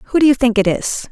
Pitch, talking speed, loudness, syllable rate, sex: 245 Hz, 325 wpm, -15 LUFS, 5.6 syllables/s, female